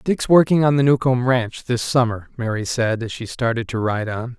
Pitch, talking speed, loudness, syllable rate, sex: 125 Hz, 220 wpm, -19 LUFS, 5.0 syllables/s, male